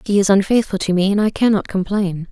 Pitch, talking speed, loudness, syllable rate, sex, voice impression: 195 Hz, 235 wpm, -17 LUFS, 6.0 syllables/s, female, feminine, adult-like, tensed, bright, soft, raspy, intellectual, friendly, elegant, kind, modest